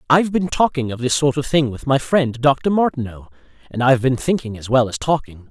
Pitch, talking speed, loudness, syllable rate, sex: 135 Hz, 230 wpm, -18 LUFS, 5.7 syllables/s, male